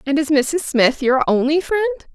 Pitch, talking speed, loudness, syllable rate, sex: 300 Hz, 195 wpm, -17 LUFS, 4.6 syllables/s, female